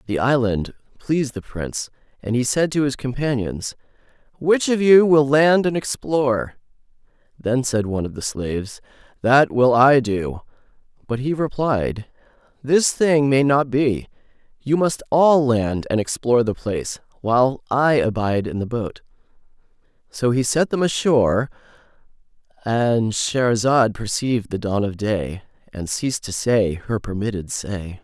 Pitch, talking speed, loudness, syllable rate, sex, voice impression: 125 Hz, 150 wpm, -20 LUFS, 4.5 syllables/s, male, very masculine, very adult-like, middle-aged, very thick, tensed, powerful, slightly bright, slightly hard, slightly muffled, fluent, slightly raspy, very cool, intellectual, slightly refreshing, very sincere, very calm, very mature, very friendly, very reassuring, unique, elegant, very wild, sweet, lively, very kind, slightly modest